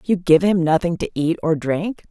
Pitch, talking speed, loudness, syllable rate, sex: 170 Hz, 230 wpm, -19 LUFS, 4.8 syllables/s, female